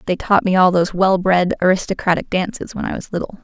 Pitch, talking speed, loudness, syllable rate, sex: 185 Hz, 225 wpm, -17 LUFS, 6.3 syllables/s, female